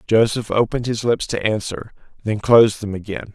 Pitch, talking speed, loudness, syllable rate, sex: 110 Hz, 180 wpm, -19 LUFS, 5.7 syllables/s, male